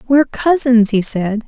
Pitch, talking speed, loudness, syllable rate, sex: 240 Hz, 160 wpm, -14 LUFS, 4.7 syllables/s, female